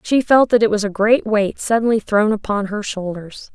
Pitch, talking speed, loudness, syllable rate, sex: 210 Hz, 220 wpm, -17 LUFS, 4.9 syllables/s, female